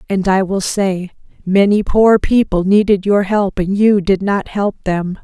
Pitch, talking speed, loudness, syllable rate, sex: 195 Hz, 185 wpm, -14 LUFS, 4.1 syllables/s, female